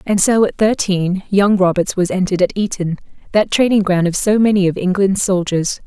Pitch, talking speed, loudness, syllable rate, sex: 190 Hz, 195 wpm, -15 LUFS, 5.3 syllables/s, female